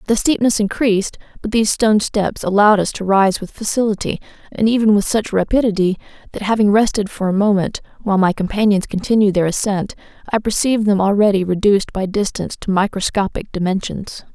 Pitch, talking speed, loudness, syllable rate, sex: 205 Hz, 165 wpm, -17 LUFS, 6.0 syllables/s, female